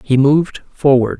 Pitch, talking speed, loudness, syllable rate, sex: 140 Hz, 150 wpm, -14 LUFS, 4.9 syllables/s, male